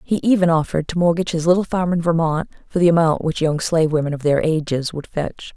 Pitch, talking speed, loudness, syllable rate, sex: 165 Hz, 235 wpm, -19 LUFS, 6.3 syllables/s, female